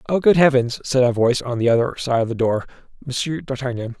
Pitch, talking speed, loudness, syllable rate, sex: 130 Hz, 225 wpm, -19 LUFS, 6.2 syllables/s, male